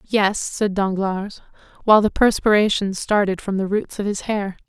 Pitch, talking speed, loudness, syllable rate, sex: 200 Hz, 165 wpm, -20 LUFS, 4.8 syllables/s, female